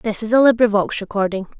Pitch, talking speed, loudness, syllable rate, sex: 215 Hz, 190 wpm, -17 LUFS, 6.2 syllables/s, female